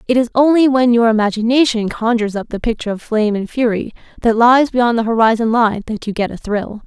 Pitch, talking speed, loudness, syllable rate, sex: 230 Hz, 220 wpm, -15 LUFS, 6.1 syllables/s, female